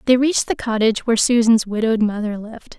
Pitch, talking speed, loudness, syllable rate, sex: 225 Hz, 195 wpm, -18 LUFS, 6.8 syllables/s, female